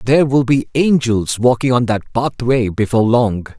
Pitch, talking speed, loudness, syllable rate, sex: 120 Hz, 165 wpm, -15 LUFS, 5.0 syllables/s, male